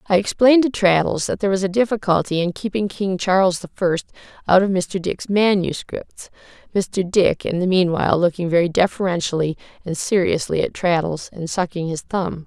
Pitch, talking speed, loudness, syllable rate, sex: 185 Hz, 175 wpm, -19 LUFS, 5.3 syllables/s, female